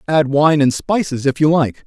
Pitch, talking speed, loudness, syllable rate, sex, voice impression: 145 Hz, 225 wpm, -15 LUFS, 4.7 syllables/s, male, very masculine, slightly old, very thick, very tensed, powerful, bright, slightly soft, very clear, fluent, slightly raspy, very cool, intellectual, refreshing, very sincere, calm, mature, very friendly, very reassuring, very unique, elegant, wild, slightly sweet, very lively, slightly kind, intense